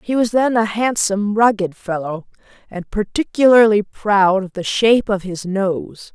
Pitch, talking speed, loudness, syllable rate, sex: 205 Hz, 155 wpm, -17 LUFS, 4.5 syllables/s, female